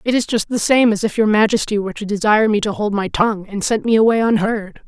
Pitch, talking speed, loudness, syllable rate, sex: 215 Hz, 270 wpm, -17 LUFS, 6.3 syllables/s, female